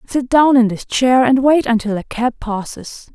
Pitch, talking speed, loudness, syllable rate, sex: 245 Hz, 210 wpm, -15 LUFS, 4.3 syllables/s, female